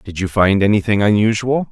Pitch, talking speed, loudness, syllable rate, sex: 105 Hz, 175 wpm, -15 LUFS, 5.5 syllables/s, male